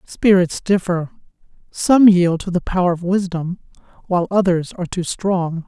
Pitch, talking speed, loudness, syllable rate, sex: 180 Hz, 150 wpm, -17 LUFS, 4.7 syllables/s, female